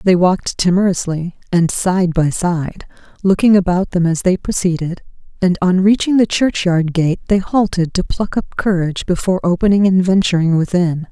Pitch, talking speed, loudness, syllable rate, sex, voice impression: 180 Hz, 160 wpm, -15 LUFS, 5.0 syllables/s, female, feminine, adult-like, relaxed, weak, soft, raspy, calm, reassuring, elegant, kind, slightly modest